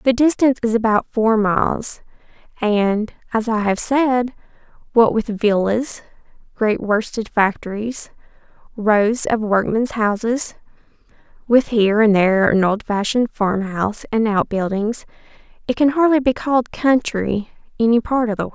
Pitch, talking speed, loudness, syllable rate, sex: 225 Hz, 135 wpm, -18 LUFS, 4.5 syllables/s, female